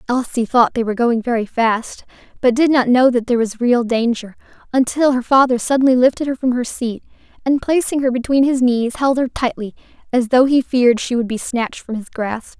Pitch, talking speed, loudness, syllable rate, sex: 245 Hz, 215 wpm, -17 LUFS, 5.5 syllables/s, female